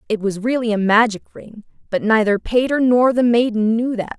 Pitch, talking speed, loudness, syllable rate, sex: 225 Hz, 200 wpm, -17 LUFS, 5.1 syllables/s, female